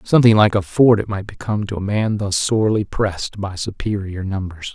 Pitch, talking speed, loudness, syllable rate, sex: 100 Hz, 200 wpm, -19 LUFS, 5.6 syllables/s, male